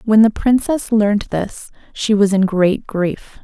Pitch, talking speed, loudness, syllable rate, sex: 205 Hz, 175 wpm, -16 LUFS, 3.6 syllables/s, female